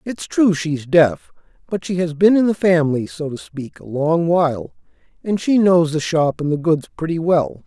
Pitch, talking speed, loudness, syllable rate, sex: 165 Hz, 210 wpm, -18 LUFS, 4.7 syllables/s, male